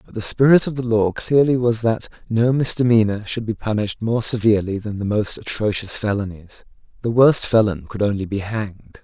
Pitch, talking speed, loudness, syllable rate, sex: 110 Hz, 185 wpm, -19 LUFS, 5.5 syllables/s, male